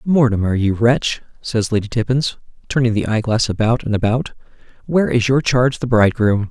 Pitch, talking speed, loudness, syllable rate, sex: 115 Hz, 165 wpm, -17 LUFS, 5.6 syllables/s, male